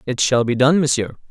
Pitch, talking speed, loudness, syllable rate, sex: 130 Hz, 230 wpm, -17 LUFS, 5.6 syllables/s, male